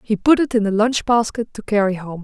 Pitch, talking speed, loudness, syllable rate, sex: 220 Hz, 270 wpm, -18 LUFS, 5.6 syllables/s, female